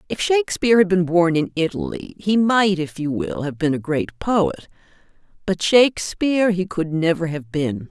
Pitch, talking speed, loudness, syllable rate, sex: 180 Hz, 180 wpm, -20 LUFS, 4.8 syllables/s, female